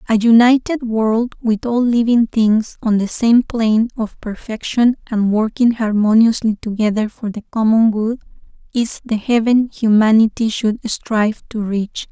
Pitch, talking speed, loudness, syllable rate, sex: 225 Hz, 145 wpm, -16 LUFS, 4.3 syllables/s, female